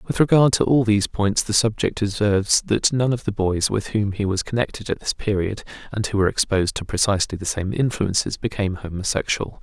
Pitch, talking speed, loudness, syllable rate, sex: 105 Hz, 205 wpm, -21 LUFS, 5.8 syllables/s, male